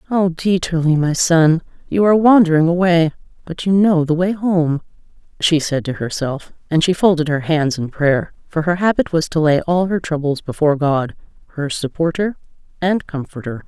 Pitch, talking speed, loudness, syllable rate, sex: 165 Hz, 175 wpm, -17 LUFS, 5.0 syllables/s, female